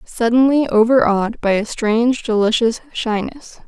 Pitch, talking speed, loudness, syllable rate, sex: 230 Hz, 115 wpm, -16 LUFS, 4.8 syllables/s, female